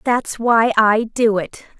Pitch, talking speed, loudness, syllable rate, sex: 220 Hz, 165 wpm, -16 LUFS, 3.6 syllables/s, female